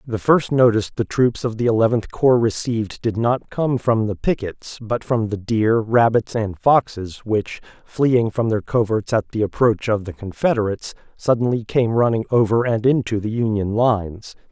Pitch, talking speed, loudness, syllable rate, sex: 115 Hz, 180 wpm, -19 LUFS, 4.8 syllables/s, male